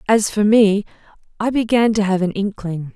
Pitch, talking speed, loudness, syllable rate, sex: 205 Hz, 185 wpm, -17 LUFS, 4.9 syllables/s, female